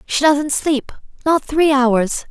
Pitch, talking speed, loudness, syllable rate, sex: 280 Hz, 130 wpm, -16 LUFS, 3.2 syllables/s, female